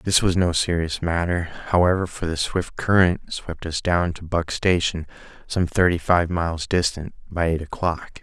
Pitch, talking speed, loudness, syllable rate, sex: 85 Hz, 175 wpm, -22 LUFS, 4.5 syllables/s, male